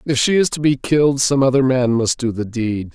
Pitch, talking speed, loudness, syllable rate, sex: 130 Hz, 265 wpm, -17 LUFS, 5.4 syllables/s, male